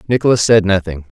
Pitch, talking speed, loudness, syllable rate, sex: 100 Hz, 150 wpm, -13 LUFS, 6.5 syllables/s, male